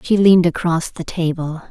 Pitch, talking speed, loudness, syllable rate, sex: 170 Hz, 175 wpm, -17 LUFS, 5.2 syllables/s, female